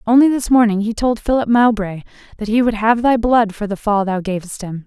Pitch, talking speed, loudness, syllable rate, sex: 220 Hz, 235 wpm, -16 LUFS, 5.5 syllables/s, female